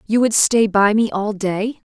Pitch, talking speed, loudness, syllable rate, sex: 210 Hz, 220 wpm, -17 LUFS, 4.1 syllables/s, female